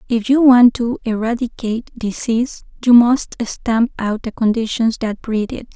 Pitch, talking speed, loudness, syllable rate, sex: 230 Hz, 155 wpm, -16 LUFS, 4.5 syllables/s, female